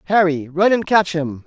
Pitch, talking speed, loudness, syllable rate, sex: 175 Hz, 205 wpm, -17 LUFS, 4.7 syllables/s, male